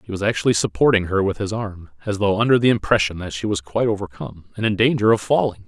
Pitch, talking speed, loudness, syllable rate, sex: 105 Hz, 245 wpm, -20 LUFS, 6.8 syllables/s, male